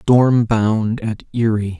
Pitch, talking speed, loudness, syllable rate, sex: 110 Hz, 135 wpm, -17 LUFS, 3.0 syllables/s, male